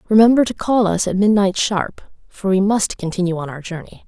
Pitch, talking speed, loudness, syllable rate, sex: 195 Hz, 205 wpm, -17 LUFS, 5.4 syllables/s, female